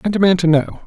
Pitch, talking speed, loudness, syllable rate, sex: 180 Hz, 280 wpm, -15 LUFS, 8.2 syllables/s, male